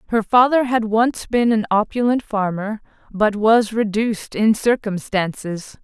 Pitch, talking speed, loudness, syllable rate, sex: 220 Hz, 135 wpm, -18 LUFS, 4.2 syllables/s, female